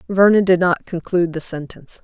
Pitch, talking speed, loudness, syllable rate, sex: 175 Hz, 175 wpm, -17 LUFS, 6.0 syllables/s, female